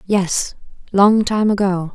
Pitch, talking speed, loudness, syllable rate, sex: 195 Hz, 95 wpm, -16 LUFS, 3.5 syllables/s, female